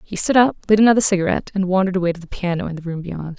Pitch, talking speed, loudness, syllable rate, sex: 185 Hz, 285 wpm, -18 LUFS, 7.9 syllables/s, female